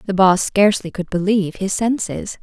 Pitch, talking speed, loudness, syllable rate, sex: 195 Hz, 175 wpm, -18 LUFS, 5.4 syllables/s, female